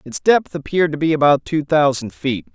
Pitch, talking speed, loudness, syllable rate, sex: 145 Hz, 210 wpm, -17 LUFS, 5.4 syllables/s, male